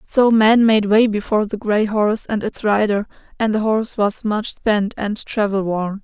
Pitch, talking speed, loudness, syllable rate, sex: 210 Hz, 200 wpm, -18 LUFS, 4.6 syllables/s, female